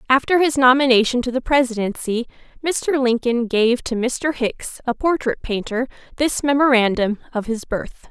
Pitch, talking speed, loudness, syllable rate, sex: 250 Hz, 150 wpm, -19 LUFS, 4.7 syllables/s, female